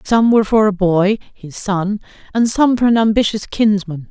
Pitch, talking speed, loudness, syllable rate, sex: 210 Hz, 190 wpm, -15 LUFS, 4.7 syllables/s, female